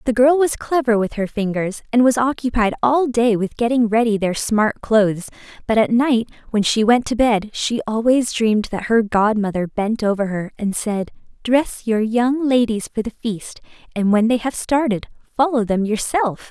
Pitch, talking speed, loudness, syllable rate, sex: 225 Hz, 190 wpm, -18 LUFS, 4.7 syllables/s, female